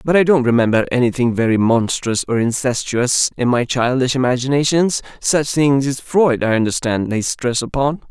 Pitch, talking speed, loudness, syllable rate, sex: 130 Hz, 155 wpm, -17 LUFS, 4.9 syllables/s, male